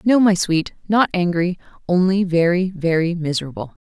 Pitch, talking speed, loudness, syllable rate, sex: 180 Hz, 110 wpm, -18 LUFS, 5.0 syllables/s, female